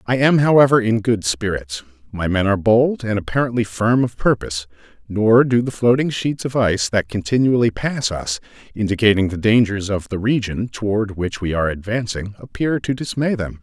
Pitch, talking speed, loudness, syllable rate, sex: 110 Hz, 180 wpm, -18 LUFS, 5.3 syllables/s, male